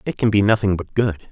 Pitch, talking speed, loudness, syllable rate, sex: 105 Hz, 275 wpm, -19 LUFS, 5.9 syllables/s, male